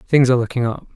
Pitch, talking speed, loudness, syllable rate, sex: 125 Hz, 250 wpm, -18 LUFS, 6.9 syllables/s, male